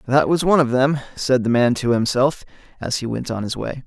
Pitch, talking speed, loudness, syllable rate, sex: 130 Hz, 250 wpm, -19 LUFS, 5.6 syllables/s, male